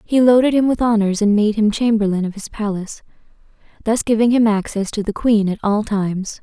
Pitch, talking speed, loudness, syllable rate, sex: 215 Hz, 205 wpm, -17 LUFS, 5.7 syllables/s, female